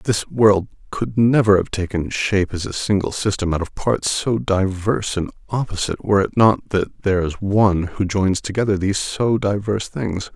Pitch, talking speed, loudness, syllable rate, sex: 100 Hz, 185 wpm, -19 LUFS, 5.0 syllables/s, male